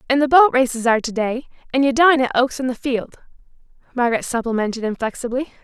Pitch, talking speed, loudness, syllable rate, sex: 250 Hz, 190 wpm, -18 LUFS, 6.5 syllables/s, female